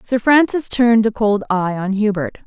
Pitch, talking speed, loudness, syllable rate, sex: 215 Hz, 195 wpm, -16 LUFS, 4.9 syllables/s, female